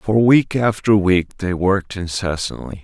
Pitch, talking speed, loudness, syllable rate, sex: 100 Hz, 150 wpm, -18 LUFS, 4.4 syllables/s, male